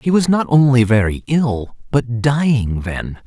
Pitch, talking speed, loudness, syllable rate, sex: 125 Hz, 165 wpm, -16 LUFS, 3.9 syllables/s, male